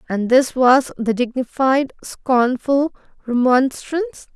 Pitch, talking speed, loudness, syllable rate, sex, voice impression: 260 Hz, 95 wpm, -18 LUFS, 3.6 syllables/s, female, very feminine, slightly young, slightly adult-like, thin, slightly relaxed, slightly weak, slightly bright, soft, slightly clear, slightly halting, very cute, intellectual, slightly refreshing, sincere, slightly calm, friendly, reassuring, unique, elegant, slightly sweet, very kind, modest